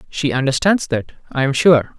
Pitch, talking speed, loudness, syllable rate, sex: 145 Hz, 180 wpm, -17 LUFS, 5.0 syllables/s, male